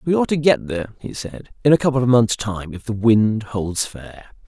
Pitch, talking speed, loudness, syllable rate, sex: 115 Hz, 240 wpm, -19 LUFS, 5.3 syllables/s, male